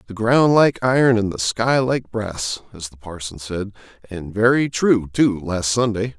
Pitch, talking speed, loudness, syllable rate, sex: 105 Hz, 185 wpm, -19 LUFS, 4.2 syllables/s, male